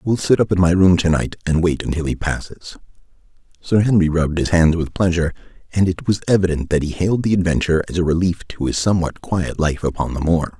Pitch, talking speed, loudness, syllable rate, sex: 85 Hz, 220 wpm, -18 LUFS, 6.3 syllables/s, male